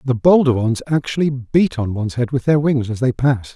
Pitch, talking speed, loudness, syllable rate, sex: 130 Hz, 235 wpm, -17 LUFS, 5.3 syllables/s, male